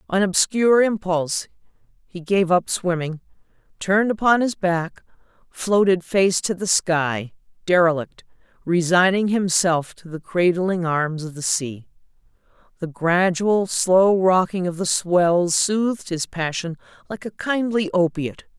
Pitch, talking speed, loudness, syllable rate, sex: 180 Hz, 130 wpm, -20 LUFS, 4.2 syllables/s, female